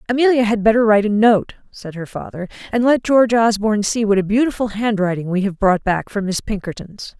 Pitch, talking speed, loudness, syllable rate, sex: 215 Hz, 210 wpm, -17 LUFS, 5.9 syllables/s, female